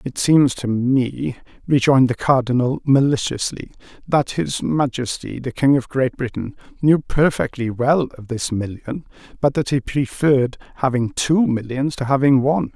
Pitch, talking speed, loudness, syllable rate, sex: 135 Hz, 150 wpm, -19 LUFS, 4.6 syllables/s, male